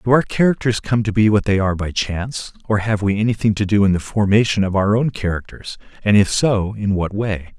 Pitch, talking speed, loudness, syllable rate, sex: 105 Hz, 235 wpm, -18 LUFS, 5.7 syllables/s, male